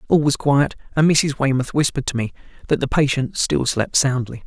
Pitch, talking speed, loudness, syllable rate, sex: 135 Hz, 200 wpm, -19 LUFS, 5.4 syllables/s, male